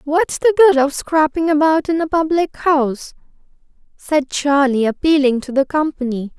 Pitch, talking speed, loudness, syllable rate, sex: 295 Hz, 150 wpm, -16 LUFS, 4.6 syllables/s, female